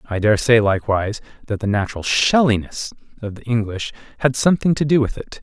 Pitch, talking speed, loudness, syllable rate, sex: 115 Hz, 175 wpm, -19 LUFS, 6.3 syllables/s, male